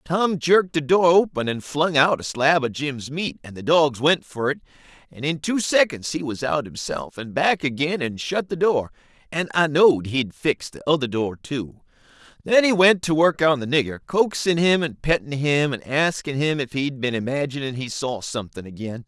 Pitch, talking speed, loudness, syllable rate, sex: 145 Hz, 210 wpm, -21 LUFS, 5.0 syllables/s, male